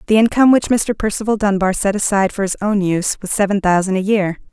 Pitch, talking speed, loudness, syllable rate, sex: 200 Hz, 225 wpm, -16 LUFS, 6.5 syllables/s, female